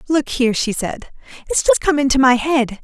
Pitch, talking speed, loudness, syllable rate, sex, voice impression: 275 Hz, 210 wpm, -16 LUFS, 5.3 syllables/s, female, feminine, adult-like, tensed, powerful, clear, fluent, intellectual, slightly friendly, elegant, lively, slightly intense